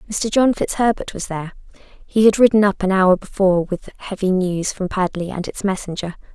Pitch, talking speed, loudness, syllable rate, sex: 195 Hz, 190 wpm, -19 LUFS, 5.2 syllables/s, female